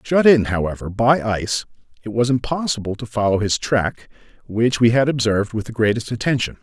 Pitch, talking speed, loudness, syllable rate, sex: 115 Hz, 180 wpm, -19 LUFS, 5.6 syllables/s, male